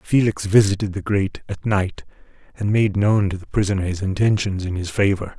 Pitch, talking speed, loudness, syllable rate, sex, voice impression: 100 Hz, 190 wpm, -20 LUFS, 5.5 syllables/s, male, masculine, middle-aged, weak, slightly muffled, slightly fluent, raspy, calm, slightly mature, wild, strict, modest